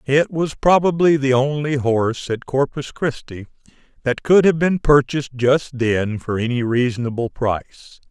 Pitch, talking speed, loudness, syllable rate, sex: 135 Hz, 150 wpm, -18 LUFS, 4.5 syllables/s, male